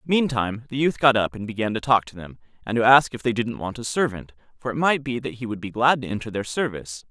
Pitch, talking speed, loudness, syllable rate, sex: 120 Hz, 280 wpm, -23 LUFS, 6.2 syllables/s, male